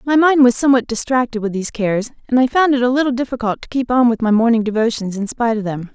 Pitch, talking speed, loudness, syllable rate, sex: 240 Hz, 265 wpm, -16 LUFS, 6.9 syllables/s, female